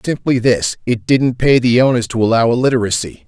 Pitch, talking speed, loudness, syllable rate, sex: 120 Hz, 185 wpm, -14 LUFS, 5.6 syllables/s, male